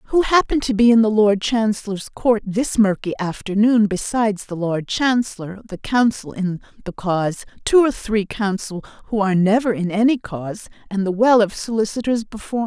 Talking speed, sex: 180 wpm, female